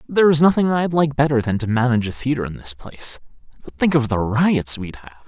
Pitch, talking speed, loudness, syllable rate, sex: 130 Hz, 240 wpm, -19 LUFS, 6.0 syllables/s, male